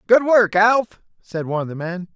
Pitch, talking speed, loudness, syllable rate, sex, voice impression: 195 Hz, 220 wpm, -18 LUFS, 5.1 syllables/s, male, masculine, adult-like, clear, slightly refreshing, slightly sincere, slightly unique